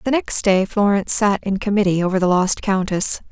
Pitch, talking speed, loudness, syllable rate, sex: 195 Hz, 200 wpm, -18 LUFS, 5.5 syllables/s, female